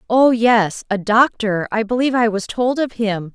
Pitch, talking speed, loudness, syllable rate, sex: 225 Hz, 160 wpm, -17 LUFS, 4.6 syllables/s, female